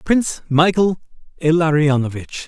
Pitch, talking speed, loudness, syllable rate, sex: 160 Hz, 75 wpm, -17 LUFS, 4.7 syllables/s, male